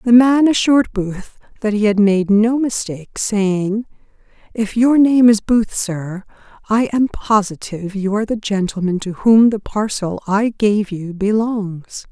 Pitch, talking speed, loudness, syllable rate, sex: 210 Hz, 160 wpm, -16 LUFS, 4.2 syllables/s, female